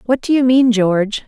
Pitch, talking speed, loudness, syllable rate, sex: 235 Hz, 235 wpm, -14 LUFS, 5.5 syllables/s, female